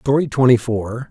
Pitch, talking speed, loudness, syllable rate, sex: 125 Hz, 165 wpm, -17 LUFS, 4.7 syllables/s, male